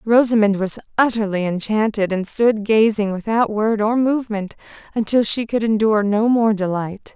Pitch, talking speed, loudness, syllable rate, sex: 215 Hz, 150 wpm, -18 LUFS, 4.9 syllables/s, female